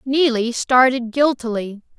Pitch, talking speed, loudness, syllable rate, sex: 245 Hz, 90 wpm, -18 LUFS, 4.0 syllables/s, female